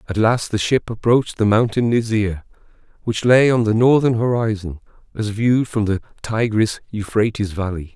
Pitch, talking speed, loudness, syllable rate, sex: 110 Hz, 160 wpm, -18 LUFS, 5.1 syllables/s, male